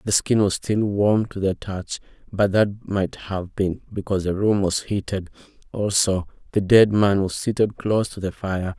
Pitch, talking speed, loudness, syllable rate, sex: 100 Hz, 190 wpm, -22 LUFS, 4.5 syllables/s, male